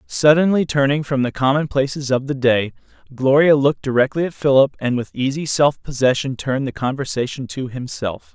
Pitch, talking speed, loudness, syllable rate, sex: 135 Hz, 165 wpm, -18 LUFS, 5.5 syllables/s, male